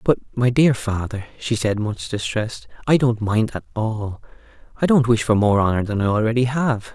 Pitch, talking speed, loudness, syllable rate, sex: 115 Hz, 200 wpm, -20 LUFS, 5.0 syllables/s, male